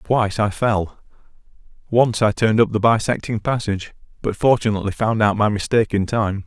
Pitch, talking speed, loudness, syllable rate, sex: 110 Hz, 165 wpm, -19 LUFS, 5.8 syllables/s, male